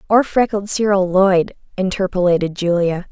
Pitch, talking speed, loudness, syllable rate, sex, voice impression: 190 Hz, 115 wpm, -17 LUFS, 4.7 syllables/s, female, feminine, slightly young, relaxed, bright, soft, raspy, cute, slightly refreshing, friendly, reassuring, kind, modest